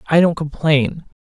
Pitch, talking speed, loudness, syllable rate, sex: 150 Hz, 145 wpm, -17 LUFS, 4.6 syllables/s, male